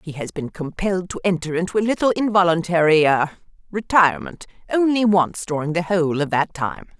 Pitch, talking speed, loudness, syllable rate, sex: 175 Hz, 165 wpm, -20 LUFS, 5.7 syllables/s, female